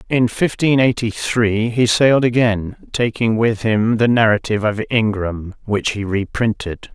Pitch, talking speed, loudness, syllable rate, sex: 110 Hz, 145 wpm, -17 LUFS, 4.3 syllables/s, male